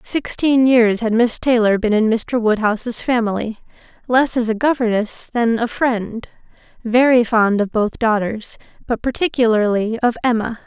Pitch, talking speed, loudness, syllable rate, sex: 230 Hz, 145 wpm, -17 LUFS, 4.5 syllables/s, female